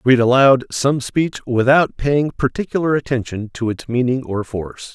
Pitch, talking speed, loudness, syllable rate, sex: 130 Hz, 160 wpm, -18 LUFS, 4.6 syllables/s, male